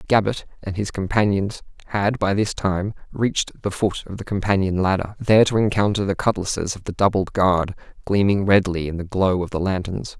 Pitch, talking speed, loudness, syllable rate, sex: 100 Hz, 190 wpm, -21 LUFS, 5.3 syllables/s, male